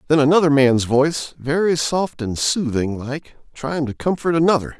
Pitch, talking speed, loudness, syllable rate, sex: 145 Hz, 165 wpm, -19 LUFS, 4.7 syllables/s, male